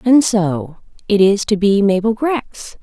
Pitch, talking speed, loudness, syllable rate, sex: 210 Hz, 170 wpm, -15 LUFS, 3.7 syllables/s, female